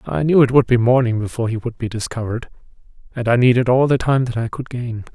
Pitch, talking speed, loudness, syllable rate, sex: 120 Hz, 245 wpm, -18 LUFS, 6.5 syllables/s, male